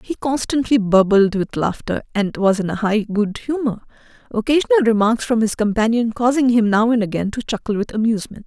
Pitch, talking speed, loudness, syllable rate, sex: 225 Hz, 185 wpm, -18 LUFS, 5.7 syllables/s, female